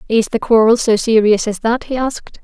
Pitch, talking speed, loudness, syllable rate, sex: 225 Hz, 220 wpm, -14 LUFS, 5.4 syllables/s, female